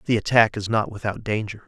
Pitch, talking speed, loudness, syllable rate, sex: 110 Hz, 215 wpm, -22 LUFS, 6.0 syllables/s, male